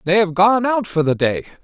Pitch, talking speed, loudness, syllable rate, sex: 185 Hz, 255 wpm, -17 LUFS, 5.2 syllables/s, male